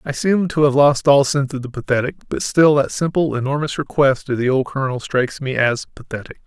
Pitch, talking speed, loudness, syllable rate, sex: 140 Hz, 225 wpm, -18 LUFS, 5.9 syllables/s, male